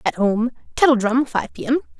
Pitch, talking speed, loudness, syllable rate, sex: 245 Hz, 180 wpm, -20 LUFS, 5.5 syllables/s, female